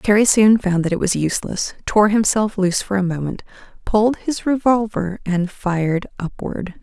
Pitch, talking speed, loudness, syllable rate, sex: 200 Hz, 165 wpm, -18 LUFS, 4.9 syllables/s, female